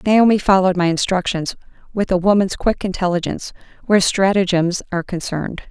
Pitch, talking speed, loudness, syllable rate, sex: 185 Hz, 135 wpm, -17 LUFS, 6.1 syllables/s, female